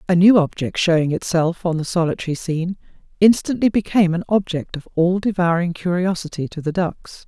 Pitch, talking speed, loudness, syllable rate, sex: 175 Hz, 165 wpm, -19 LUFS, 5.6 syllables/s, female